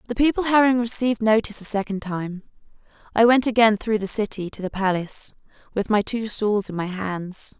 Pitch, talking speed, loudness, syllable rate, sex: 210 Hz, 190 wpm, -22 LUFS, 5.5 syllables/s, female